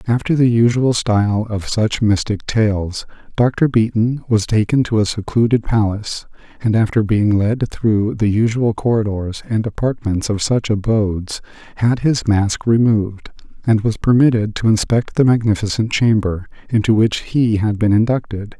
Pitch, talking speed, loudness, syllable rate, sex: 110 Hz, 150 wpm, -17 LUFS, 4.6 syllables/s, male